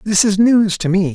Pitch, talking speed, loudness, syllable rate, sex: 200 Hz, 260 wpm, -14 LUFS, 4.6 syllables/s, male